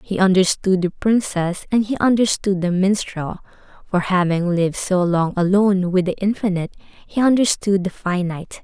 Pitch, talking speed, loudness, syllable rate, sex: 190 Hz, 155 wpm, -19 LUFS, 5.2 syllables/s, female